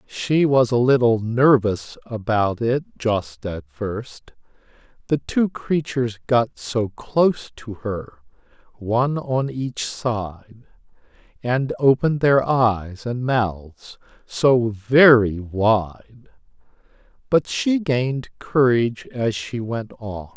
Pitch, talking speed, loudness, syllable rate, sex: 120 Hz, 115 wpm, -20 LUFS, 3.2 syllables/s, male